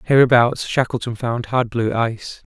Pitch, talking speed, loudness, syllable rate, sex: 120 Hz, 140 wpm, -18 LUFS, 4.8 syllables/s, male